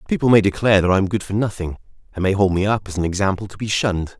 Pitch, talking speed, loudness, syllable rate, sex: 100 Hz, 285 wpm, -19 LUFS, 7.4 syllables/s, male